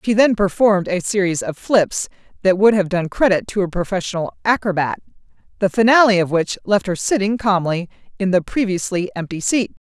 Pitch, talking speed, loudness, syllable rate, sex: 195 Hz, 175 wpm, -18 LUFS, 5.4 syllables/s, female